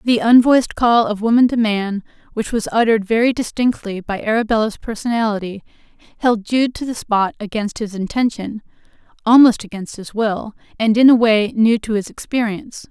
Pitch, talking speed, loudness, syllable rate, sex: 220 Hz, 160 wpm, -17 LUFS, 5.3 syllables/s, female